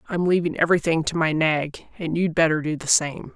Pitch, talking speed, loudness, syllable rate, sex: 160 Hz, 215 wpm, -22 LUFS, 5.6 syllables/s, female